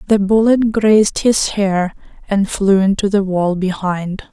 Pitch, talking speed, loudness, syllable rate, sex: 200 Hz, 155 wpm, -15 LUFS, 4.0 syllables/s, female